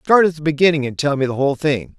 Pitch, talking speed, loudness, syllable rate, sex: 150 Hz, 305 wpm, -17 LUFS, 6.7 syllables/s, male